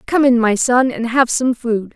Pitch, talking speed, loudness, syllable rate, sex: 245 Hz, 245 wpm, -15 LUFS, 4.4 syllables/s, female